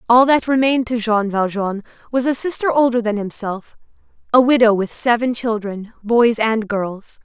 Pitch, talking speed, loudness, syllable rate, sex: 230 Hz, 155 wpm, -17 LUFS, 4.7 syllables/s, female